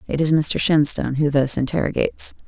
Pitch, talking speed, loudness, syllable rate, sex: 150 Hz, 170 wpm, -18 LUFS, 5.8 syllables/s, female